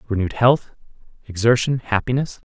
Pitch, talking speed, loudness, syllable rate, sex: 115 Hz, 95 wpm, -19 LUFS, 5.8 syllables/s, male